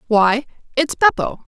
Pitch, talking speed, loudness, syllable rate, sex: 260 Hz, 115 wpm, -18 LUFS, 4.0 syllables/s, female